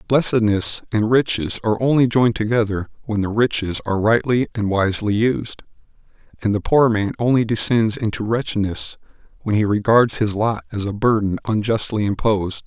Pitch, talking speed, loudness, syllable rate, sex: 110 Hz, 155 wpm, -19 LUFS, 5.4 syllables/s, male